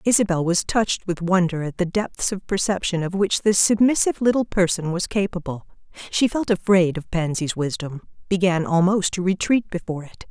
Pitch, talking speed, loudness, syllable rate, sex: 185 Hz, 170 wpm, -21 LUFS, 5.4 syllables/s, female